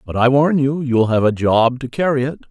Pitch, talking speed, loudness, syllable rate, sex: 130 Hz, 265 wpm, -16 LUFS, 5.2 syllables/s, male